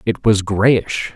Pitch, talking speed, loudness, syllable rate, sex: 105 Hz, 155 wpm, -16 LUFS, 2.9 syllables/s, male